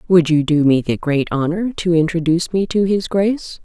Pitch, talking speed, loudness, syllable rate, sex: 170 Hz, 215 wpm, -17 LUFS, 5.3 syllables/s, female